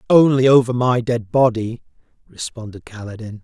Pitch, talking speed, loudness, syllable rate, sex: 120 Hz, 120 wpm, -17 LUFS, 5.0 syllables/s, male